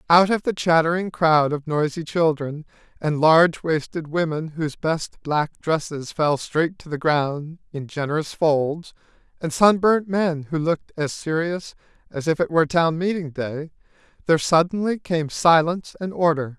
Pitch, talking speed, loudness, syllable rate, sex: 160 Hz, 160 wpm, -21 LUFS, 4.7 syllables/s, male